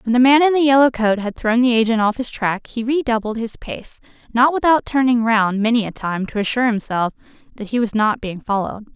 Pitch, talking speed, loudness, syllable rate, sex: 230 Hz, 230 wpm, -18 LUFS, 5.8 syllables/s, female